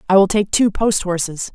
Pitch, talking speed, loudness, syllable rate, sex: 195 Hz, 235 wpm, -17 LUFS, 5.1 syllables/s, female